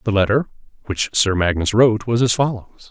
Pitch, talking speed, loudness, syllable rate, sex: 110 Hz, 185 wpm, -18 LUFS, 5.5 syllables/s, male